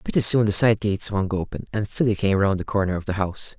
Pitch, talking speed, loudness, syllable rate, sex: 100 Hz, 270 wpm, -21 LUFS, 6.2 syllables/s, male